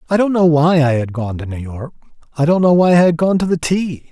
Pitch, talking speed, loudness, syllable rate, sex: 155 Hz, 290 wpm, -15 LUFS, 5.8 syllables/s, male